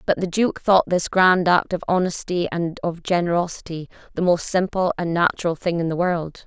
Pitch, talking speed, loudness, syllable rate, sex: 175 Hz, 195 wpm, -21 LUFS, 5.1 syllables/s, female